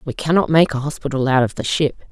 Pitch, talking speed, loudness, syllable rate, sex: 145 Hz, 255 wpm, -18 LUFS, 6.5 syllables/s, female